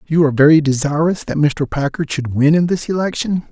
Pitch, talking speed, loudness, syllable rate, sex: 155 Hz, 205 wpm, -16 LUFS, 5.7 syllables/s, male